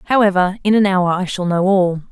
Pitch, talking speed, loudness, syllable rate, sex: 190 Hz, 225 wpm, -16 LUFS, 5.5 syllables/s, female